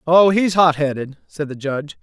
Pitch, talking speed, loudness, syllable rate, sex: 160 Hz, 210 wpm, -17 LUFS, 5.0 syllables/s, male